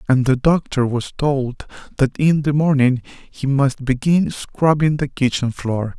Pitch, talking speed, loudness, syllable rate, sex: 135 Hz, 160 wpm, -18 LUFS, 4.0 syllables/s, male